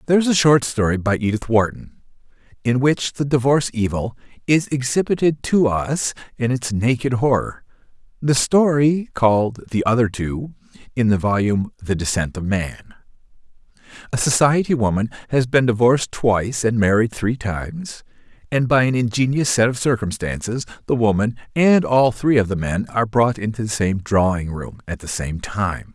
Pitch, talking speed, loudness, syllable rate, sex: 120 Hz, 165 wpm, -19 LUFS, 5.1 syllables/s, male